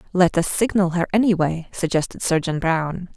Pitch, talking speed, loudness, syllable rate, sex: 175 Hz, 150 wpm, -20 LUFS, 5.0 syllables/s, female